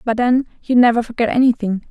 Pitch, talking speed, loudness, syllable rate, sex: 235 Hz, 190 wpm, -16 LUFS, 6.1 syllables/s, female